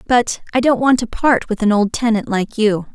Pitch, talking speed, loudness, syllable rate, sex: 225 Hz, 245 wpm, -16 LUFS, 4.9 syllables/s, female